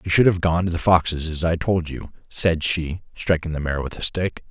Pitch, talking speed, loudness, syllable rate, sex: 85 Hz, 255 wpm, -22 LUFS, 5.1 syllables/s, male